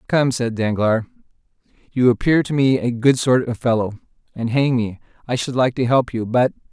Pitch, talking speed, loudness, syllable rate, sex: 125 Hz, 195 wpm, -19 LUFS, 5.1 syllables/s, male